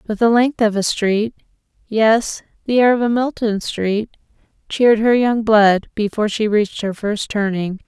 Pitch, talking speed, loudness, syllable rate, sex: 220 Hz, 160 wpm, -17 LUFS, 4.6 syllables/s, female